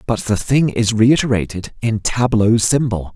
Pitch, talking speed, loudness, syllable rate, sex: 115 Hz, 150 wpm, -16 LUFS, 4.4 syllables/s, male